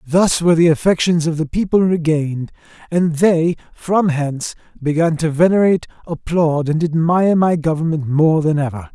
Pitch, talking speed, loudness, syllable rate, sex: 160 Hz, 155 wpm, -16 LUFS, 5.1 syllables/s, male